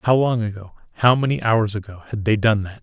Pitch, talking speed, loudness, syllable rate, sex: 110 Hz, 235 wpm, -20 LUFS, 6.0 syllables/s, male